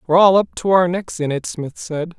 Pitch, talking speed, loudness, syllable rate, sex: 165 Hz, 275 wpm, -18 LUFS, 5.4 syllables/s, male